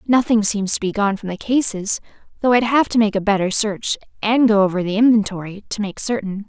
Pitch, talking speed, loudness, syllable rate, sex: 210 Hz, 220 wpm, -18 LUFS, 5.7 syllables/s, female